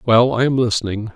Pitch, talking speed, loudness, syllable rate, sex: 115 Hz, 210 wpm, -17 LUFS, 5.6 syllables/s, male